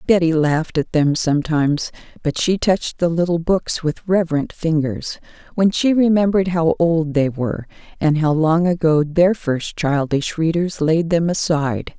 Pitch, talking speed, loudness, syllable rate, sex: 165 Hz, 160 wpm, -18 LUFS, 4.7 syllables/s, female